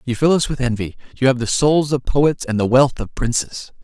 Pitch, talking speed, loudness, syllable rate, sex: 130 Hz, 250 wpm, -18 LUFS, 5.2 syllables/s, male